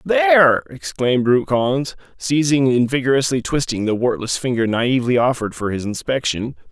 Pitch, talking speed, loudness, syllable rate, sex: 125 Hz, 145 wpm, -18 LUFS, 5.3 syllables/s, male